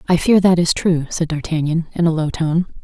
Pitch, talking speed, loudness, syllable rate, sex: 165 Hz, 235 wpm, -17 LUFS, 5.3 syllables/s, female